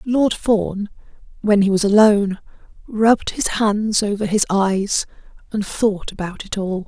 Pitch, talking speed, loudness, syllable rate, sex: 205 Hz, 150 wpm, -18 LUFS, 4.1 syllables/s, female